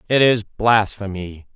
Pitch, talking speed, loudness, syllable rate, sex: 105 Hz, 115 wpm, -18 LUFS, 3.8 syllables/s, male